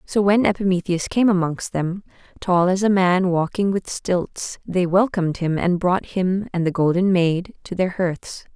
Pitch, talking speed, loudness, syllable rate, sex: 185 Hz, 180 wpm, -20 LUFS, 4.3 syllables/s, female